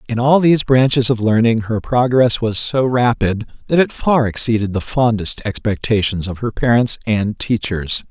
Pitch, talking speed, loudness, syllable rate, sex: 115 Hz, 170 wpm, -16 LUFS, 4.7 syllables/s, male